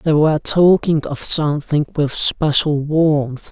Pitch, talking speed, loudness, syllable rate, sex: 150 Hz, 135 wpm, -16 LUFS, 3.9 syllables/s, male